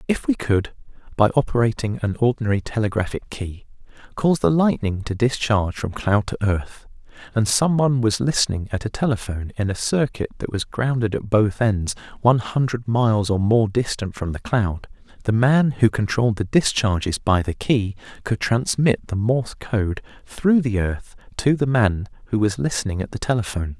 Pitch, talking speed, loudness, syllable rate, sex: 110 Hz, 175 wpm, -21 LUFS, 5.2 syllables/s, male